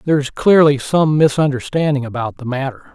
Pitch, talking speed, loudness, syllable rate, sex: 140 Hz, 165 wpm, -16 LUFS, 5.9 syllables/s, male